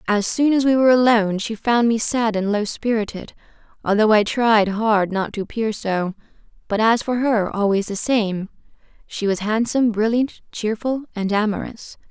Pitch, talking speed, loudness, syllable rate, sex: 220 Hz, 175 wpm, -19 LUFS, 4.9 syllables/s, female